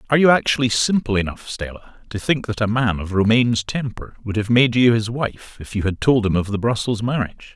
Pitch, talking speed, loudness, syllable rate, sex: 115 Hz, 230 wpm, -19 LUFS, 5.8 syllables/s, male